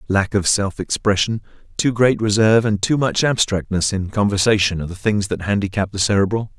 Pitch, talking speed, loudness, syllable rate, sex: 105 Hz, 180 wpm, -18 LUFS, 5.7 syllables/s, male